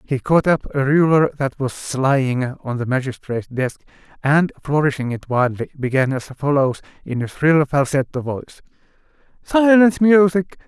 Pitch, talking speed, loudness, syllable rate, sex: 145 Hz, 145 wpm, -18 LUFS, 5.0 syllables/s, male